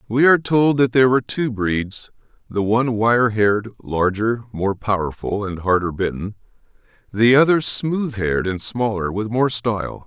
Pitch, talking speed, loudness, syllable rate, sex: 110 Hz, 160 wpm, -19 LUFS, 4.8 syllables/s, male